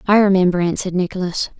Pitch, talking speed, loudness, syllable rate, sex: 185 Hz, 150 wpm, -17 LUFS, 7.2 syllables/s, female